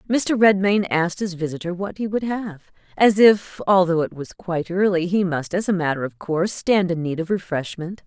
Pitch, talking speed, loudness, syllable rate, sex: 185 Hz, 210 wpm, -20 LUFS, 5.2 syllables/s, female